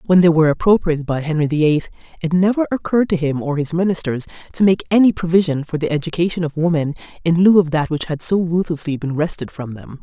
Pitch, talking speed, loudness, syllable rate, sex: 165 Hz, 220 wpm, -17 LUFS, 6.4 syllables/s, female